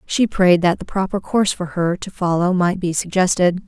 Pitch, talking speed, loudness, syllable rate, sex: 185 Hz, 210 wpm, -18 LUFS, 5.1 syllables/s, female